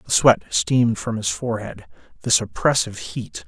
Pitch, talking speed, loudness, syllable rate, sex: 115 Hz, 155 wpm, -20 LUFS, 5.0 syllables/s, male